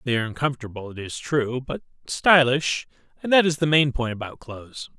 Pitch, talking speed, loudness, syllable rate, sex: 135 Hz, 195 wpm, -22 LUFS, 5.8 syllables/s, male